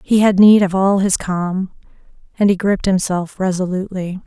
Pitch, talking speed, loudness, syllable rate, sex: 190 Hz, 170 wpm, -16 LUFS, 5.2 syllables/s, female